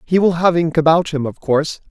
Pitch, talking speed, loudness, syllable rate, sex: 160 Hz, 250 wpm, -16 LUFS, 5.8 syllables/s, male